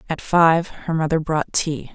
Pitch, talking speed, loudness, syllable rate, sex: 160 Hz, 185 wpm, -19 LUFS, 4.0 syllables/s, female